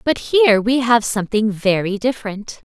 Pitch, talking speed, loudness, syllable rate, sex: 225 Hz, 150 wpm, -17 LUFS, 5.2 syllables/s, female